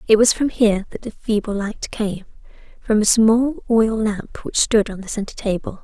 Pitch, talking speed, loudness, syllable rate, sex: 215 Hz, 195 wpm, -19 LUFS, 4.8 syllables/s, female